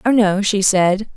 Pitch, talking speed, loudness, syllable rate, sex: 200 Hz, 205 wpm, -15 LUFS, 3.9 syllables/s, female